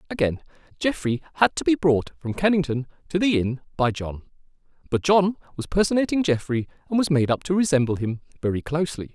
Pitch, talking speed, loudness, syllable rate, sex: 155 Hz, 175 wpm, -23 LUFS, 6.0 syllables/s, male